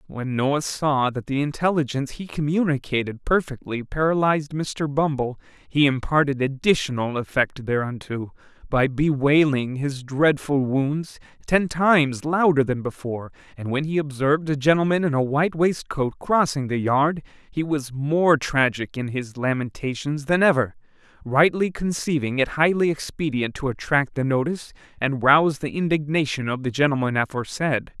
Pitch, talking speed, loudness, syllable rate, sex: 145 Hz, 140 wpm, -22 LUFS, 4.9 syllables/s, male